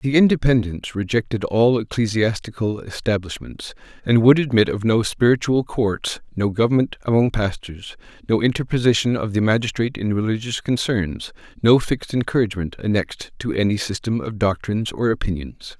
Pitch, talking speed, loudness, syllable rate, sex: 110 Hz, 135 wpm, -20 LUFS, 5.4 syllables/s, male